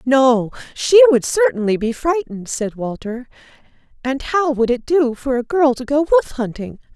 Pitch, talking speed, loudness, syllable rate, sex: 265 Hz, 170 wpm, -17 LUFS, 4.8 syllables/s, female